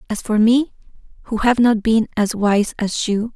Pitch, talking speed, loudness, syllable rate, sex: 220 Hz, 195 wpm, -17 LUFS, 4.5 syllables/s, female